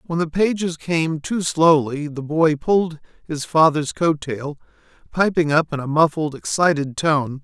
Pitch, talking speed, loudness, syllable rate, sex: 155 Hz, 160 wpm, -19 LUFS, 4.3 syllables/s, male